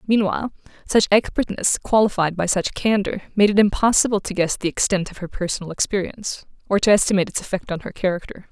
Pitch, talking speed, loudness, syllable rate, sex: 195 Hz, 185 wpm, -20 LUFS, 6.3 syllables/s, female